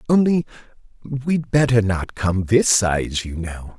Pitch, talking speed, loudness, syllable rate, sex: 110 Hz, 145 wpm, -20 LUFS, 3.9 syllables/s, male